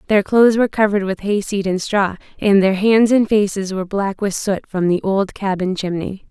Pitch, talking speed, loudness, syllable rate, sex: 200 Hz, 210 wpm, -17 LUFS, 5.3 syllables/s, female